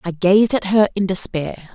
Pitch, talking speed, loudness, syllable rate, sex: 190 Hz, 205 wpm, -17 LUFS, 4.5 syllables/s, female